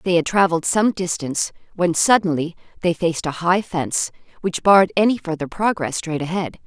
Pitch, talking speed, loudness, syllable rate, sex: 175 Hz, 170 wpm, -20 LUFS, 5.5 syllables/s, female